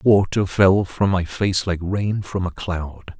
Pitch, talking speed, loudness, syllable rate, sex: 95 Hz, 190 wpm, -20 LUFS, 3.5 syllables/s, male